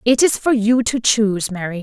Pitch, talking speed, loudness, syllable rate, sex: 225 Hz, 230 wpm, -17 LUFS, 5.3 syllables/s, female